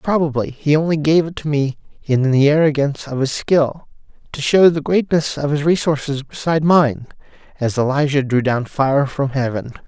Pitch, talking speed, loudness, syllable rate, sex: 145 Hz, 175 wpm, -17 LUFS, 5.1 syllables/s, male